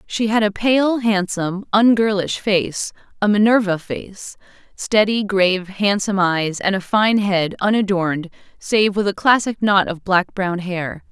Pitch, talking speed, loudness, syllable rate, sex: 200 Hz, 140 wpm, -18 LUFS, 4.2 syllables/s, female